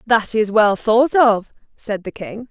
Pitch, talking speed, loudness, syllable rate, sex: 220 Hz, 190 wpm, -16 LUFS, 3.7 syllables/s, female